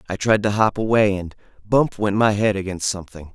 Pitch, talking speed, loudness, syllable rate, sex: 100 Hz, 195 wpm, -20 LUFS, 5.5 syllables/s, male